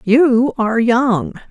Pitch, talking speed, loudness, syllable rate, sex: 240 Hz, 120 wpm, -15 LUFS, 3.3 syllables/s, female